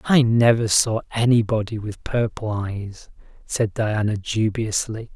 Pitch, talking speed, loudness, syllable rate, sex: 110 Hz, 115 wpm, -21 LUFS, 4.0 syllables/s, male